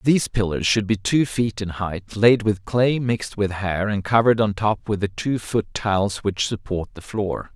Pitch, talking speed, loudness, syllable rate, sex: 105 Hz, 215 wpm, -22 LUFS, 4.7 syllables/s, male